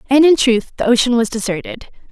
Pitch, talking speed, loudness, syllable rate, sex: 240 Hz, 200 wpm, -15 LUFS, 6.5 syllables/s, female